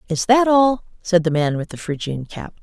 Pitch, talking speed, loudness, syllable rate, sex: 185 Hz, 230 wpm, -19 LUFS, 5.0 syllables/s, female